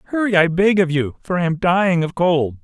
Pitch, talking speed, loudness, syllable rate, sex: 175 Hz, 250 wpm, -17 LUFS, 5.7 syllables/s, male